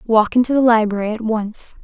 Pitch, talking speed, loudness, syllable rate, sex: 225 Hz, 195 wpm, -17 LUFS, 5.4 syllables/s, female